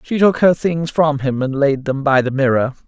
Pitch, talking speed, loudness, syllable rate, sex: 145 Hz, 250 wpm, -16 LUFS, 4.8 syllables/s, male